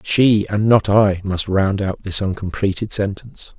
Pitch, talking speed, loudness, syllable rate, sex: 100 Hz, 170 wpm, -18 LUFS, 4.4 syllables/s, male